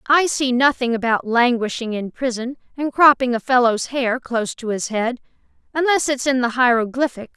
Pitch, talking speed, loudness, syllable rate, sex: 250 Hz, 170 wpm, -19 LUFS, 5.1 syllables/s, female